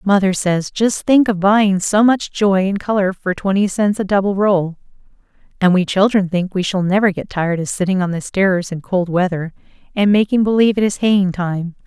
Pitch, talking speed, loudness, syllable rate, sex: 195 Hz, 205 wpm, -16 LUFS, 5.1 syllables/s, female